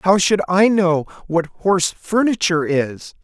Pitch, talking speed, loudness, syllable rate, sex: 180 Hz, 150 wpm, -18 LUFS, 4.2 syllables/s, male